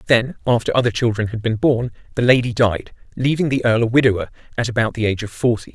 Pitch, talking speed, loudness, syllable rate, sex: 115 Hz, 220 wpm, -19 LUFS, 6.6 syllables/s, male